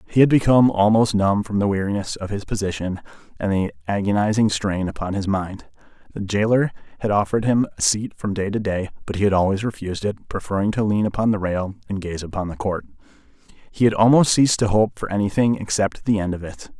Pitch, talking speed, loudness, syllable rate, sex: 100 Hz, 210 wpm, -21 LUFS, 6.1 syllables/s, male